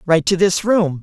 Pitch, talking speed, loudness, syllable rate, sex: 180 Hz, 235 wpm, -16 LUFS, 4.4 syllables/s, male